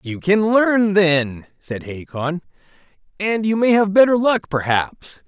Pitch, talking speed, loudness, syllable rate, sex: 180 Hz, 150 wpm, -17 LUFS, 3.7 syllables/s, male